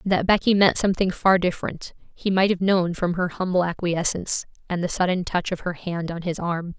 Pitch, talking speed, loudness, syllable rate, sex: 180 Hz, 210 wpm, -23 LUFS, 5.4 syllables/s, female